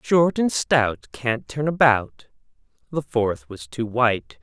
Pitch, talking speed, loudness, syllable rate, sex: 125 Hz, 150 wpm, -22 LUFS, 3.5 syllables/s, male